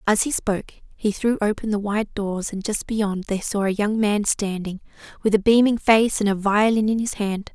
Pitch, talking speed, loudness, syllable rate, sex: 210 Hz, 225 wpm, -21 LUFS, 4.9 syllables/s, female